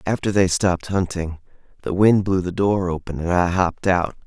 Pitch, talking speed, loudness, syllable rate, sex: 90 Hz, 195 wpm, -20 LUFS, 5.3 syllables/s, male